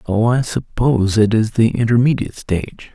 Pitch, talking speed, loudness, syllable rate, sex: 115 Hz, 165 wpm, -16 LUFS, 5.3 syllables/s, male